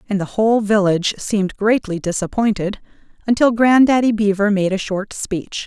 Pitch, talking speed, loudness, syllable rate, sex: 205 Hz, 150 wpm, -17 LUFS, 5.2 syllables/s, female